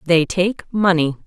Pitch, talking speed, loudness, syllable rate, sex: 180 Hz, 145 wpm, -18 LUFS, 4.0 syllables/s, female